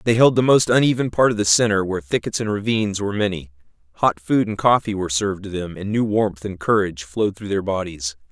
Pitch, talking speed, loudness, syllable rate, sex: 100 Hz, 230 wpm, -20 LUFS, 6.4 syllables/s, male